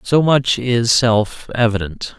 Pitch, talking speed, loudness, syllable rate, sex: 115 Hz, 110 wpm, -16 LUFS, 3.4 syllables/s, male